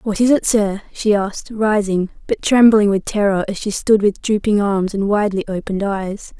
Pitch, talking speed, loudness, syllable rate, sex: 205 Hz, 195 wpm, -17 LUFS, 5.1 syllables/s, female